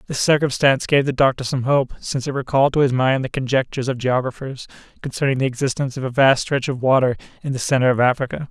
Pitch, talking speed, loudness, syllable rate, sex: 130 Hz, 220 wpm, -19 LUFS, 6.8 syllables/s, male